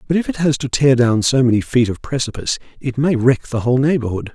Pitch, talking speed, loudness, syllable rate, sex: 130 Hz, 250 wpm, -17 LUFS, 6.3 syllables/s, male